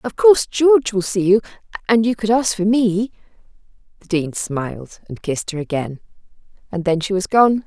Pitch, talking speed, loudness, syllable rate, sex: 200 Hz, 190 wpm, -18 LUFS, 5.4 syllables/s, female